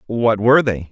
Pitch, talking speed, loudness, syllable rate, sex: 110 Hz, 195 wpm, -15 LUFS, 5.3 syllables/s, male